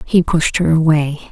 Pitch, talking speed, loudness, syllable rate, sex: 160 Hz, 180 wpm, -15 LUFS, 4.3 syllables/s, female